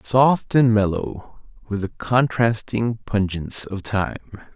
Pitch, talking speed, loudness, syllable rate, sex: 110 Hz, 120 wpm, -21 LUFS, 4.0 syllables/s, male